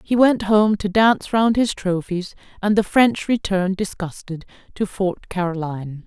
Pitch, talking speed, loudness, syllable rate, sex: 195 Hz, 160 wpm, -20 LUFS, 4.6 syllables/s, female